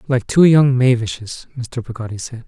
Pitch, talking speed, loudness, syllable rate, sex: 125 Hz, 170 wpm, -16 LUFS, 5.0 syllables/s, male